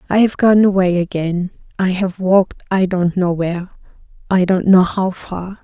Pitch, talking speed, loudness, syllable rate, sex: 185 Hz, 170 wpm, -16 LUFS, 4.6 syllables/s, female